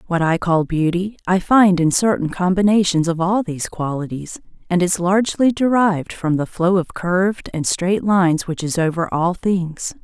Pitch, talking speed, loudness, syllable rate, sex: 180 Hz, 180 wpm, -18 LUFS, 4.8 syllables/s, female